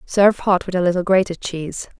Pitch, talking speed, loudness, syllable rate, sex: 185 Hz, 210 wpm, -19 LUFS, 6.1 syllables/s, female